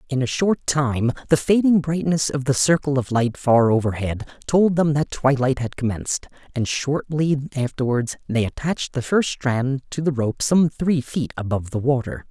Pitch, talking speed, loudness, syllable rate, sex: 135 Hz, 180 wpm, -21 LUFS, 4.8 syllables/s, male